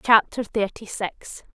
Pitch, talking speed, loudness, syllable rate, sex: 210 Hz, 115 wpm, -24 LUFS, 3.7 syllables/s, female